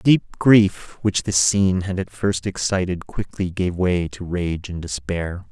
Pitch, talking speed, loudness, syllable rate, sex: 90 Hz, 185 wpm, -21 LUFS, 4.1 syllables/s, male